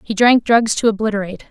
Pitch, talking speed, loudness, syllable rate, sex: 215 Hz, 200 wpm, -15 LUFS, 6.4 syllables/s, female